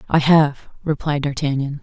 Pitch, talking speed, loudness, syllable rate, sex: 145 Hz, 130 wpm, -19 LUFS, 4.6 syllables/s, female